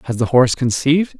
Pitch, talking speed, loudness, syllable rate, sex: 135 Hz, 200 wpm, -16 LUFS, 6.9 syllables/s, male